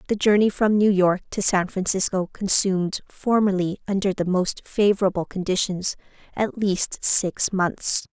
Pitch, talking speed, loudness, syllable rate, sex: 195 Hz, 140 wpm, -22 LUFS, 4.4 syllables/s, female